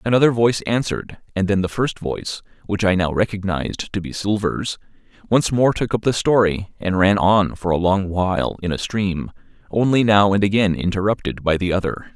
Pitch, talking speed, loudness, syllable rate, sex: 100 Hz, 190 wpm, -19 LUFS, 5.3 syllables/s, male